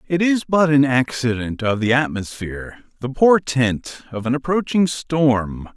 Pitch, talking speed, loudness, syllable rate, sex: 135 Hz, 135 wpm, -19 LUFS, 4.2 syllables/s, male